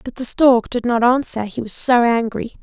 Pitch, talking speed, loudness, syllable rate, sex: 235 Hz, 230 wpm, -17 LUFS, 4.8 syllables/s, female